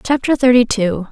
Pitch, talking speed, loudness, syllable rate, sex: 240 Hz, 160 wpm, -14 LUFS, 5.0 syllables/s, female